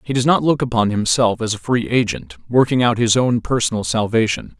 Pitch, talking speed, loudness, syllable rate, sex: 115 Hz, 210 wpm, -17 LUFS, 5.5 syllables/s, male